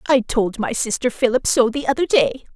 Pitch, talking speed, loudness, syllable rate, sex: 250 Hz, 210 wpm, -19 LUFS, 5.6 syllables/s, female